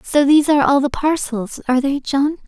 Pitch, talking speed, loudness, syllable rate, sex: 275 Hz, 220 wpm, -17 LUFS, 5.8 syllables/s, female